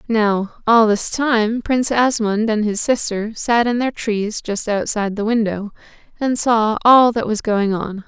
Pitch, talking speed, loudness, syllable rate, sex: 220 Hz, 180 wpm, -17 LUFS, 4.3 syllables/s, female